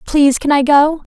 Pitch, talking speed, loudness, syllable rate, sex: 290 Hz, 200 wpm, -13 LUFS, 5.2 syllables/s, female